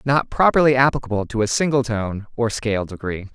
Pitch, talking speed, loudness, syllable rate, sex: 120 Hz, 180 wpm, -20 LUFS, 5.7 syllables/s, male